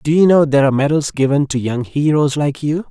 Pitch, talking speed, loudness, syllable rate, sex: 145 Hz, 250 wpm, -15 LUFS, 6.0 syllables/s, male